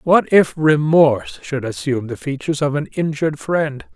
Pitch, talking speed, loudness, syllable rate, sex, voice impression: 150 Hz, 165 wpm, -18 LUFS, 5.1 syllables/s, male, very masculine, very adult-like, slightly old, very thick, slightly tensed, slightly weak, slightly bright, slightly soft, clear, fluent, slightly raspy, cool, very intellectual, slightly refreshing, sincere, slightly calm, mature, friendly, reassuring, very unique, slightly elegant, slightly wild, sweet, lively, kind, slightly modest